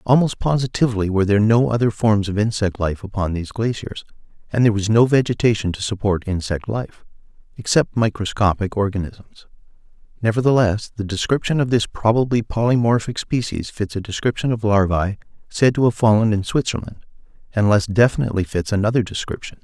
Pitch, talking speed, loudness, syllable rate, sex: 105 Hz, 155 wpm, -19 LUFS, 5.8 syllables/s, male